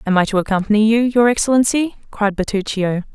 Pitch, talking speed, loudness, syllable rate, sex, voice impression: 215 Hz, 170 wpm, -17 LUFS, 6.1 syllables/s, female, feminine, adult-like, slightly calm, slightly sweet